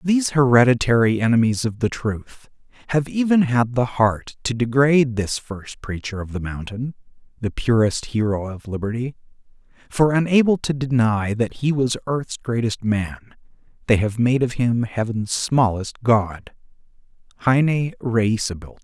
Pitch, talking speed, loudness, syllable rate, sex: 120 Hz, 135 wpm, -20 LUFS, 4.6 syllables/s, male